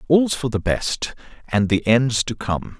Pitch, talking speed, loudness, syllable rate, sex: 120 Hz, 195 wpm, -21 LUFS, 4.0 syllables/s, male